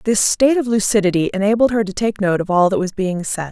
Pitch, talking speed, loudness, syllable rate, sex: 205 Hz, 255 wpm, -17 LUFS, 6.3 syllables/s, female